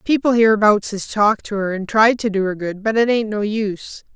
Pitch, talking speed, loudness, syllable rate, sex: 210 Hz, 245 wpm, -17 LUFS, 5.5 syllables/s, female